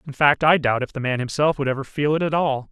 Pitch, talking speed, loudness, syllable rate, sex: 140 Hz, 310 wpm, -21 LUFS, 6.3 syllables/s, male